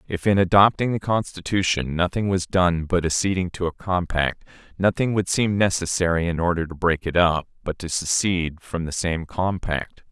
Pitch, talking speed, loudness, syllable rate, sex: 90 Hz, 180 wpm, -22 LUFS, 5.0 syllables/s, male